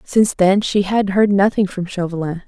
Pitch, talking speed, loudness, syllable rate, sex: 195 Hz, 195 wpm, -17 LUFS, 5.1 syllables/s, female